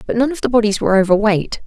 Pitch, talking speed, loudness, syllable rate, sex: 215 Hz, 250 wpm, -15 LUFS, 7.3 syllables/s, female